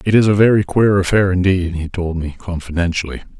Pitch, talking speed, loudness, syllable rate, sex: 90 Hz, 195 wpm, -16 LUFS, 5.9 syllables/s, male